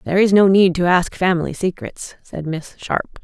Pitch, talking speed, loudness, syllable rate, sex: 180 Hz, 205 wpm, -17 LUFS, 5.0 syllables/s, female